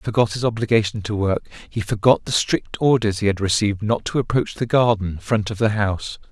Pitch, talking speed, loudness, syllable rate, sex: 105 Hz, 220 wpm, -20 LUFS, 5.7 syllables/s, male